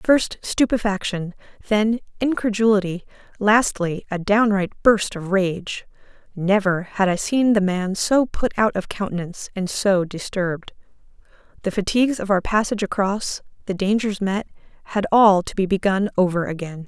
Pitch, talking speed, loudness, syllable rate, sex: 200 Hz, 140 wpm, -21 LUFS, 4.7 syllables/s, female